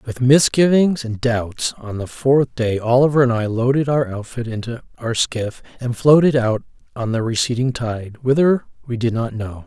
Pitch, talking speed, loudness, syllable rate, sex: 125 Hz, 180 wpm, -18 LUFS, 4.6 syllables/s, male